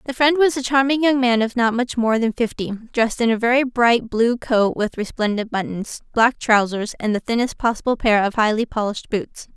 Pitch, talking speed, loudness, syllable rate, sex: 230 Hz, 215 wpm, -19 LUFS, 5.4 syllables/s, female